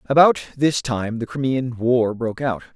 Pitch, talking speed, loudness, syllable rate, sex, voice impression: 125 Hz, 175 wpm, -20 LUFS, 4.7 syllables/s, male, very masculine, very adult-like, middle-aged, very tensed, powerful, bright, very hard, clear, fluent, cool, intellectual, slightly refreshing, very sincere, very calm, friendly, very reassuring, slightly unique, wild, slightly sweet, very lively, kind, slightly intense